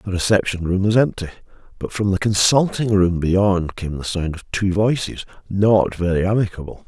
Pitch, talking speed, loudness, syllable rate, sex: 95 Hz, 175 wpm, -19 LUFS, 4.9 syllables/s, male